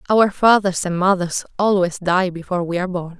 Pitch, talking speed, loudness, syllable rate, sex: 185 Hz, 190 wpm, -18 LUFS, 5.6 syllables/s, female